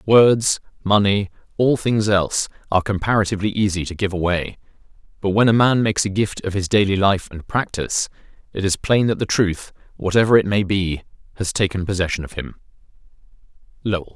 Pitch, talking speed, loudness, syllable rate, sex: 100 Hz, 170 wpm, -19 LUFS, 5.8 syllables/s, male